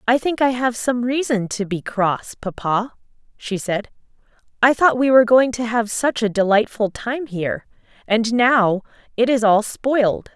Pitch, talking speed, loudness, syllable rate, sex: 230 Hz, 175 wpm, -19 LUFS, 4.4 syllables/s, female